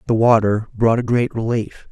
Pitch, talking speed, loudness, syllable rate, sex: 115 Hz, 190 wpm, -18 LUFS, 4.8 syllables/s, male